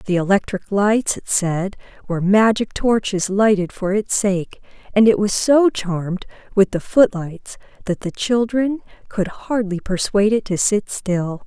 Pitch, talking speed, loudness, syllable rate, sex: 200 Hz, 155 wpm, -19 LUFS, 4.3 syllables/s, female